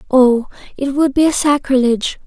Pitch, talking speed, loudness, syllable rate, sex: 270 Hz, 160 wpm, -15 LUFS, 5.2 syllables/s, female